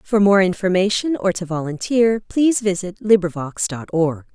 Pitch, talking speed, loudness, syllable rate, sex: 190 Hz, 150 wpm, -19 LUFS, 4.9 syllables/s, female